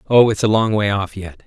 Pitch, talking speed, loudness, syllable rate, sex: 105 Hz, 285 wpm, -17 LUFS, 5.5 syllables/s, male